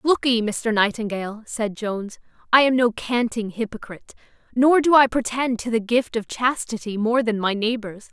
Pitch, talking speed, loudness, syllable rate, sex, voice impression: 230 Hz, 170 wpm, -21 LUFS, 5.0 syllables/s, female, feminine, slightly young, slightly tensed, slightly clear, slightly cute, refreshing, slightly sincere, friendly